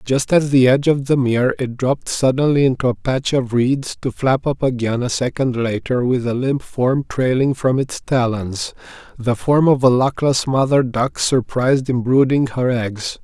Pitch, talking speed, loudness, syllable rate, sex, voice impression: 130 Hz, 185 wpm, -17 LUFS, 4.6 syllables/s, male, very masculine, very adult-like, very old, very thick, slightly tensed, slightly weak, slightly dark, slightly soft, muffled, slightly fluent, slightly raspy, cool, intellectual, very sincere, calm, friendly, reassuring, unique, slightly elegant, wild, slightly sweet, kind, slightly modest